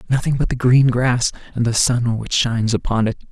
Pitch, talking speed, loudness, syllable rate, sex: 120 Hz, 215 wpm, -18 LUFS, 5.4 syllables/s, male